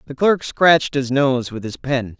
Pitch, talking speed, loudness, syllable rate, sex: 135 Hz, 220 wpm, -18 LUFS, 4.5 syllables/s, male